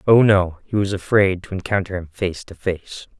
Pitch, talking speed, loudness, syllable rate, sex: 95 Hz, 205 wpm, -20 LUFS, 4.8 syllables/s, male